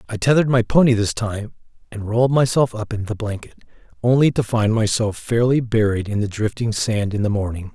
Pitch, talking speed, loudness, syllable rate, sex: 115 Hz, 200 wpm, -19 LUFS, 5.6 syllables/s, male